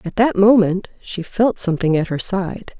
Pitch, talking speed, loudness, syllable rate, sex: 190 Hz, 195 wpm, -17 LUFS, 4.7 syllables/s, female